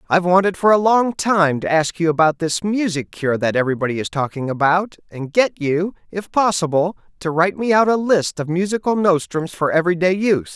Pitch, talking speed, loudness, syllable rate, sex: 170 Hz, 205 wpm, -18 LUFS, 5.6 syllables/s, male